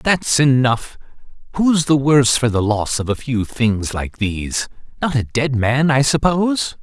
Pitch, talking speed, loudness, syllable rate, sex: 130 Hz, 175 wpm, -17 LUFS, 4.3 syllables/s, male